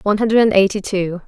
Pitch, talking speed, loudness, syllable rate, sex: 200 Hz, 190 wpm, -16 LUFS, 6.1 syllables/s, female